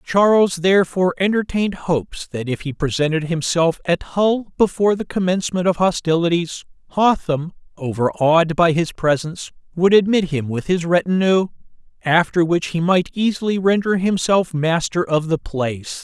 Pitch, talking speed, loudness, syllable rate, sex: 175 Hz, 140 wpm, -18 LUFS, 5.1 syllables/s, male